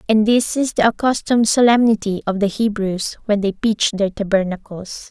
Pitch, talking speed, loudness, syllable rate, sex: 210 Hz, 165 wpm, -17 LUFS, 5.1 syllables/s, female